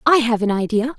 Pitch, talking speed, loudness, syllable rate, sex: 240 Hz, 245 wpm, -18 LUFS, 5.8 syllables/s, female